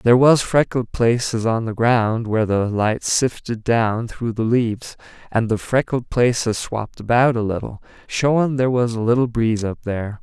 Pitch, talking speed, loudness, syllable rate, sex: 115 Hz, 180 wpm, -19 LUFS, 4.9 syllables/s, male